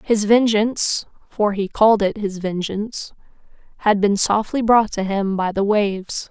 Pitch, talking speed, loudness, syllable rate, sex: 205 Hz, 145 wpm, -19 LUFS, 4.6 syllables/s, female